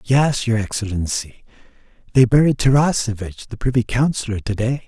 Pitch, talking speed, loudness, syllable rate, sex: 120 Hz, 135 wpm, -19 LUFS, 5.2 syllables/s, male